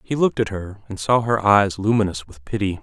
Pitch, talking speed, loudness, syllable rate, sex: 100 Hz, 235 wpm, -20 LUFS, 5.6 syllables/s, male